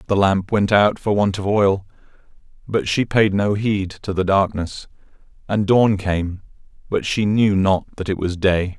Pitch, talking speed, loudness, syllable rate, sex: 100 Hz, 185 wpm, -19 LUFS, 4.3 syllables/s, male